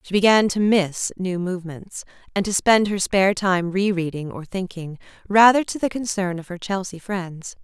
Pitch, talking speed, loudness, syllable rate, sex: 190 Hz, 190 wpm, -21 LUFS, 4.8 syllables/s, female